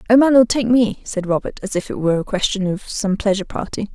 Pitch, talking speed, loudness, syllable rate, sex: 210 Hz, 260 wpm, -18 LUFS, 6.3 syllables/s, female